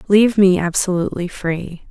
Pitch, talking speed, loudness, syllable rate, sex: 185 Hz, 125 wpm, -17 LUFS, 5.1 syllables/s, female